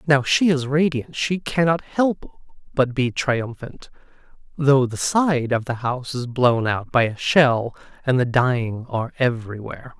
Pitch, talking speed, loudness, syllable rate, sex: 130 Hz, 160 wpm, -21 LUFS, 4.4 syllables/s, male